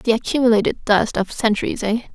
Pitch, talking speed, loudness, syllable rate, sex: 225 Hz, 170 wpm, -19 LUFS, 6.2 syllables/s, female